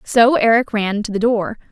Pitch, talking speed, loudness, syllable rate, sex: 220 Hz, 210 wpm, -16 LUFS, 4.6 syllables/s, female